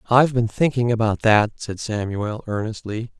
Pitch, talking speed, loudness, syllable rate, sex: 110 Hz, 150 wpm, -21 LUFS, 4.7 syllables/s, male